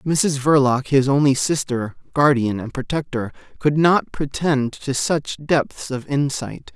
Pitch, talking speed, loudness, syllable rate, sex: 140 Hz, 140 wpm, -20 LUFS, 3.8 syllables/s, male